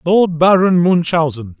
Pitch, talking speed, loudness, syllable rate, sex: 170 Hz, 115 wpm, -13 LUFS, 4.0 syllables/s, male